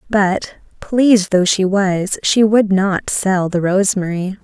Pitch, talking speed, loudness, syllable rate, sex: 195 Hz, 150 wpm, -15 LUFS, 3.8 syllables/s, female